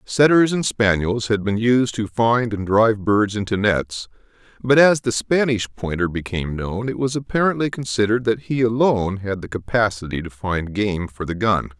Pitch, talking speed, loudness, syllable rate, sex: 110 Hz, 185 wpm, -20 LUFS, 5.0 syllables/s, male